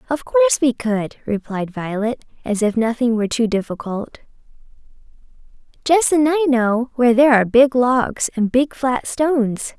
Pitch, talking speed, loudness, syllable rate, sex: 240 Hz, 155 wpm, -18 LUFS, 4.8 syllables/s, female